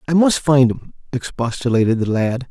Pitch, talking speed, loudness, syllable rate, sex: 130 Hz, 165 wpm, -17 LUFS, 5.1 syllables/s, male